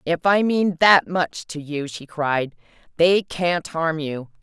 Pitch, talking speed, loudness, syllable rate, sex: 165 Hz, 175 wpm, -20 LUFS, 3.5 syllables/s, female